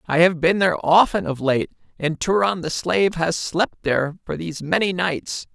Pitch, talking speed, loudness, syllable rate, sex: 170 Hz, 195 wpm, -20 LUFS, 5.0 syllables/s, male